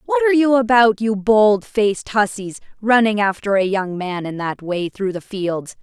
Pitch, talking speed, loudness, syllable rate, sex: 210 Hz, 195 wpm, -18 LUFS, 4.6 syllables/s, female